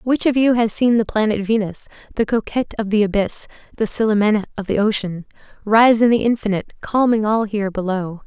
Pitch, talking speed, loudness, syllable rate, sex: 215 Hz, 190 wpm, -18 LUFS, 6.0 syllables/s, female